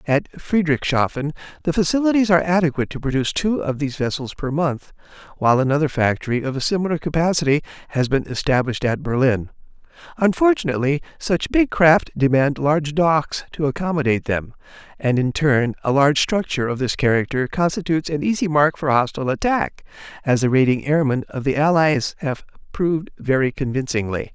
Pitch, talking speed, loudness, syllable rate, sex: 145 Hz, 155 wpm, -20 LUFS, 5.9 syllables/s, male